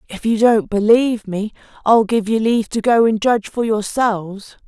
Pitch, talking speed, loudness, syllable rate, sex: 220 Hz, 190 wpm, -16 LUFS, 5.2 syllables/s, female